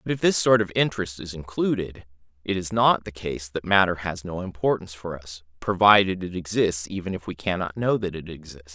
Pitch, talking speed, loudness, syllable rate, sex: 90 Hz, 215 wpm, -24 LUFS, 5.6 syllables/s, male